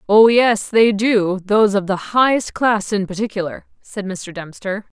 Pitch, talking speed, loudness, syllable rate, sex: 205 Hz, 155 wpm, -17 LUFS, 4.4 syllables/s, female